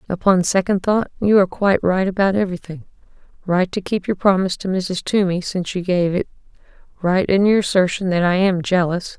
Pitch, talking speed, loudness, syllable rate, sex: 185 Hz, 185 wpm, -18 LUFS, 5.8 syllables/s, female